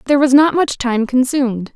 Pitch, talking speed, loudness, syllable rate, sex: 260 Hz, 205 wpm, -14 LUFS, 5.7 syllables/s, female